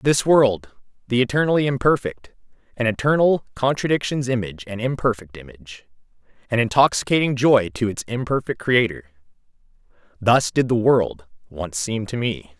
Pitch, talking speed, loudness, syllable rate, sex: 115 Hz, 120 wpm, -20 LUFS, 5.2 syllables/s, male